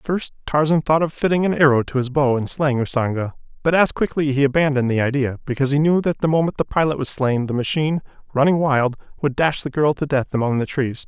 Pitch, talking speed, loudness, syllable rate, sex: 140 Hz, 240 wpm, -19 LUFS, 6.2 syllables/s, male